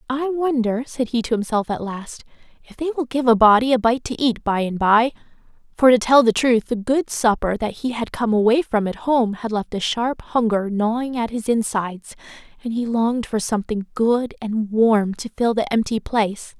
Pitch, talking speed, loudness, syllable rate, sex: 230 Hz, 215 wpm, -20 LUFS, 5.0 syllables/s, female